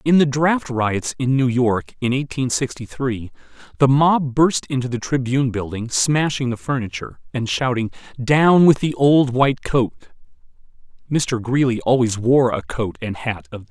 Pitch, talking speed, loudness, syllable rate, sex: 130 Hz, 175 wpm, -19 LUFS, 4.7 syllables/s, male